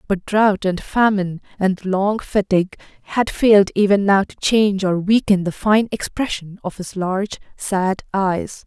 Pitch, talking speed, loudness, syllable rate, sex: 195 Hz, 160 wpm, -18 LUFS, 4.5 syllables/s, female